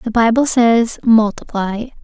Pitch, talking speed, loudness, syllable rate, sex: 230 Hz, 120 wpm, -14 LUFS, 3.7 syllables/s, female